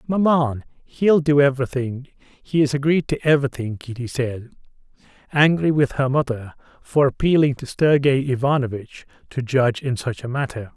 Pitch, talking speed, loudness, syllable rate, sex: 135 Hz, 145 wpm, -20 LUFS, 5.1 syllables/s, male